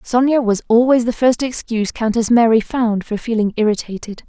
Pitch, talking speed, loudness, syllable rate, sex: 230 Hz, 170 wpm, -16 LUFS, 5.4 syllables/s, female